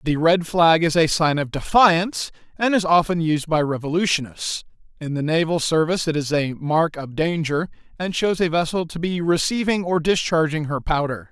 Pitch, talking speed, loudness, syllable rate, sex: 160 Hz, 185 wpm, -20 LUFS, 5.1 syllables/s, male